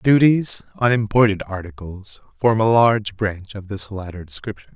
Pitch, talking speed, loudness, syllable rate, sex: 105 Hz, 150 wpm, -19 LUFS, 4.8 syllables/s, male